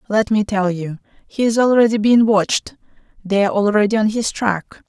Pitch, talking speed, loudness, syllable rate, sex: 210 Hz, 185 wpm, -17 LUFS, 5.5 syllables/s, female